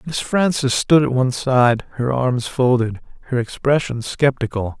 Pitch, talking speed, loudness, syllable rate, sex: 130 Hz, 150 wpm, -18 LUFS, 4.5 syllables/s, male